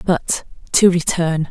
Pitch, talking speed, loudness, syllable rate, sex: 170 Hz, 120 wpm, -17 LUFS, 3.4 syllables/s, female